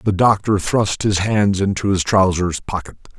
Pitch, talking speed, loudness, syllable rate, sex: 100 Hz, 170 wpm, -18 LUFS, 4.4 syllables/s, male